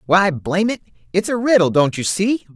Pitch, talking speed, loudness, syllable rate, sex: 185 Hz, 210 wpm, -18 LUFS, 5.4 syllables/s, male